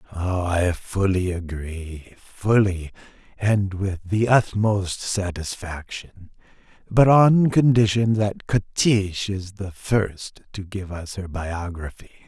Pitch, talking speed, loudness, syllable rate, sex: 100 Hz, 110 wpm, -22 LUFS, 3.4 syllables/s, male